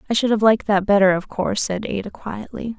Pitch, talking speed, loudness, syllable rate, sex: 200 Hz, 235 wpm, -19 LUFS, 6.3 syllables/s, female